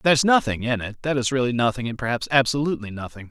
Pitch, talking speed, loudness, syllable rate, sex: 125 Hz, 220 wpm, -22 LUFS, 7.0 syllables/s, male